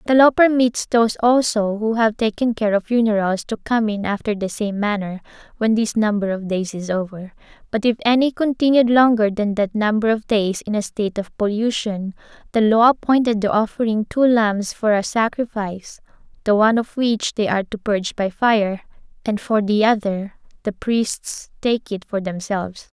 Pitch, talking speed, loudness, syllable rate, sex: 215 Hz, 185 wpm, -19 LUFS, 5.0 syllables/s, female